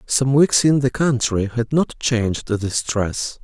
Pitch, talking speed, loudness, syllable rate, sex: 125 Hz, 175 wpm, -19 LUFS, 4.0 syllables/s, male